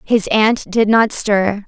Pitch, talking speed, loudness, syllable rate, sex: 210 Hz, 180 wpm, -15 LUFS, 3.3 syllables/s, female